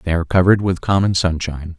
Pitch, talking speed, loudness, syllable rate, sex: 90 Hz, 200 wpm, -17 LUFS, 6.9 syllables/s, male